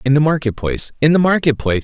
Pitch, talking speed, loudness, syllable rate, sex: 135 Hz, 260 wpm, -16 LUFS, 7.1 syllables/s, male